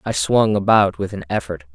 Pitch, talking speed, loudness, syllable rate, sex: 95 Hz, 205 wpm, -18 LUFS, 5.2 syllables/s, male